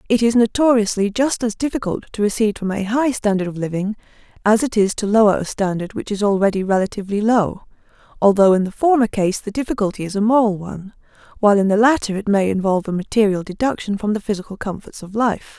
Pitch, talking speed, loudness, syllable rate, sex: 210 Hz, 205 wpm, -18 LUFS, 6.3 syllables/s, female